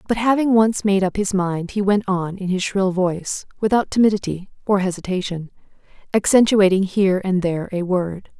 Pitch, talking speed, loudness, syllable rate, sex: 195 Hz, 165 wpm, -19 LUFS, 5.3 syllables/s, female